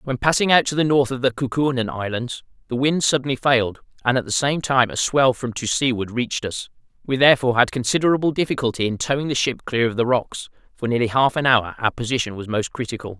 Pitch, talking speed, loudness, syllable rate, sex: 125 Hz, 225 wpm, -20 LUFS, 6.2 syllables/s, male